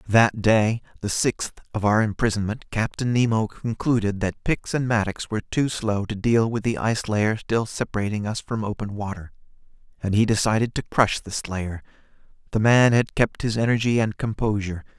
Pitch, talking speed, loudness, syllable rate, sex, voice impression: 110 Hz, 170 wpm, -23 LUFS, 5.2 syllables/s, male, very masculine, very adult-like, thick, tensed, slightly weak, slightly bright, very soft, slightly muffled, very fluent, cool, intellectual, very refreshing, very sincere, calm, slightly mature, very friendly, reassuring, unique, elegant, slightly wild, very sweet, very lively, kind, slightly intense, slightly light